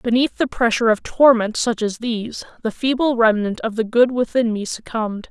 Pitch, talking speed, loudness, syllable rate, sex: 230 Hz, 190 wpm, -19 LUFS, 5.3 syllables/s, female